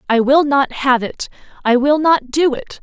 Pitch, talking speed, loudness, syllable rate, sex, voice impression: 275 Hz, 215 wpm, -15 LUFS, 4.4 syllables/s, female, very feminine, young, slightly adult-like, very thin, tensed, powerful, very bright, hard, very clear, very fluent, slightly raspy, very cute, intellectual, very refreshing, sincere, slightly calm, very friendly, reassuring, very unique, elegant, very wild, sweet, very lively, very strict, very intense, sharp, light